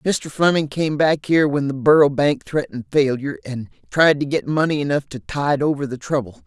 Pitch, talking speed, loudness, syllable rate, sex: 140 Hz, 205 wpm, -19 LUFS, 5.4 syllables/s, male